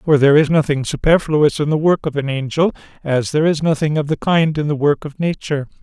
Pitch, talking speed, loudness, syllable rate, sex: 150 Hz, 235 wpm, -17 LUFS, 6.1 syllables/s, male